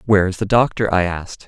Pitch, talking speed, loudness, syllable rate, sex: 100 Hz, 245 wpm, -17 LUFS, 6.8 syllables/s, male